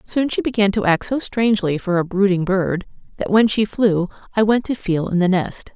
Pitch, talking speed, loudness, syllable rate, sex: 200 Hz, 230 wpm, -19 LUFS, 5.1 syllables/s, female